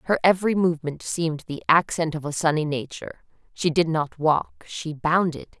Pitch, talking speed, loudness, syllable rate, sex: 160 Hz, 160 wpm, -23 LUFS, 5.4 syllables/s, female